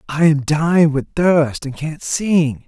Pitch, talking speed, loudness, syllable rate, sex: 155 Hz, 180 wpm, -17 LUFS, 3.7 syllables/s, male